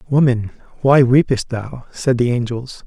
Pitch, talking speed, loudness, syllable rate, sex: 125 Hz, 145 wpm, -17 LUFS, 4.3 syllables/s, male